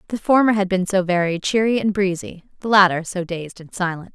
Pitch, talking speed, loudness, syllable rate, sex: 190 Hz, 215 wpm, -19 LUFS, 5.6 syllables/s, female